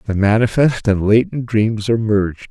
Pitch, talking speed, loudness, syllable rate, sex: 110 Hz, 170 wpm, -16 LUFS, 5.2 syllables/s, male